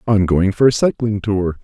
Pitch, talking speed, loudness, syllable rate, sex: 105 Hz, 220 wpm, -16 LUFS, 4.7 syllables/s, male